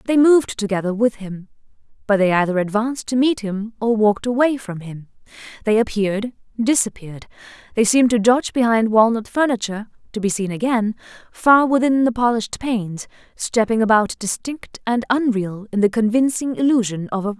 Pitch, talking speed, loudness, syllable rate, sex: 225 Hz, 165 wpm, -19 LUFS, 5.6 syllables/s, female